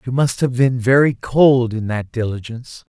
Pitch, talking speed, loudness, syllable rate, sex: 120 Hz, 185 wpm, -17 LUFS, 4.7 syllables/s, male